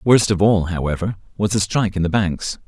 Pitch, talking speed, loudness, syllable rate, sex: 95 Hz, 225 wpm, -19 LUFS, 5.6 syllables/s, male